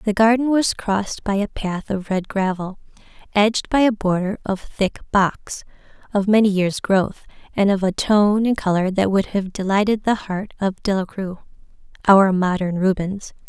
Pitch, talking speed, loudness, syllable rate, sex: 200 Hz, 170 wpm, -20 LUFS, 4.6 syllables/s, female